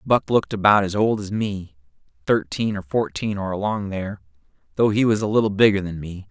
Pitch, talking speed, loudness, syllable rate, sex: 100 Hz, 200 wpm, -21 LUFS, 5.6 syllables/s, male